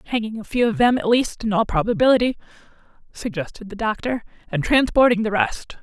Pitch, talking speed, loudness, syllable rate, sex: 230 Hz, 175 wpm, -20 LUFS, 5.8 syllables/s, female